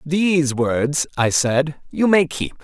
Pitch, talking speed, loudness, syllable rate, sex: 150 Hz, 160 wpm, -19 LUFS, 3.5 syllables/s, male